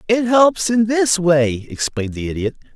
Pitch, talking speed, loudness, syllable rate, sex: 180 Hz, 175 wpm, -17 LUFS, 4.6 syllables/s, male